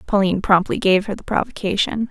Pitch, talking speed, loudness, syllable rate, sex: 205 Hz, 170 wpm, -19 LUFS, 6.1 syllables/s, female